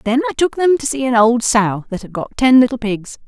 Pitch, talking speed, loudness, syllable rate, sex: 240 Hz, 275 wpm, -15 LUFS, 5.4 syllables/s, female